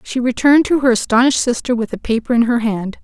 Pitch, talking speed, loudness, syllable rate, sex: 240 Hz, 240 wpm, -15 LUFS, 6.6 syllables/s, female